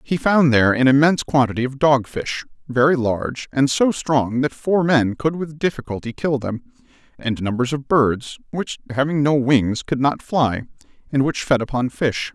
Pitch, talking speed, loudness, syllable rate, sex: 135 Hz, 185 wpm, -19 LUFS, 4.8 syllables/s, male